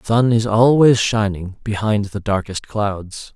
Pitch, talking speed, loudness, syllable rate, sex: 105 Hz, 160 wpm, -17 LUFS, 4.0 syllables/s, male